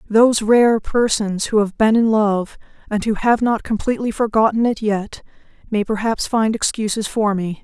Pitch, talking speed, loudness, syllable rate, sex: 215 Hz, 175 wpm, -18 LUFS, 4.8 syllables/s, female